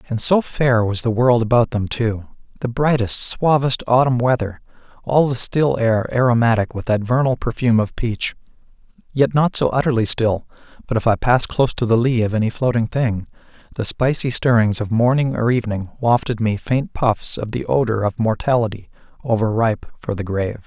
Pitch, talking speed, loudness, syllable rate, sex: 120 Hz, 185 wpm, -18 LUFS, 5.3 syllables/s, male